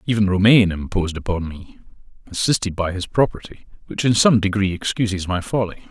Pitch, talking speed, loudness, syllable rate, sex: 100 Hz, 150 wpm, -19 LUFS, 6.0 syllables/s, male